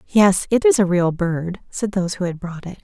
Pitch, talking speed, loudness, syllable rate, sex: 185 Hz, 255 wpm, -19 LUFS, 5.1 syllables/s, female